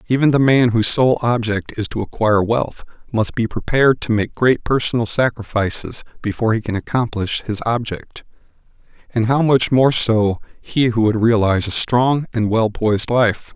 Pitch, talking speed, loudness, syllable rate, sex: 115 Hz, 175 wpm, -17 LUFS, 5.0 syllables/s, male